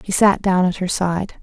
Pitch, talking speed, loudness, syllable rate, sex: 185 Hz, 250 wpm, -18 LUFS, 4.8 syllables/s, female